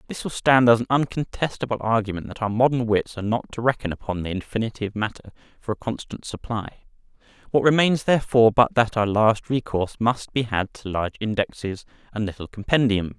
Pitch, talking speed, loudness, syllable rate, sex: 115 Hz, 185 wpm, -23 LUFS, 6.0 syllables/s, male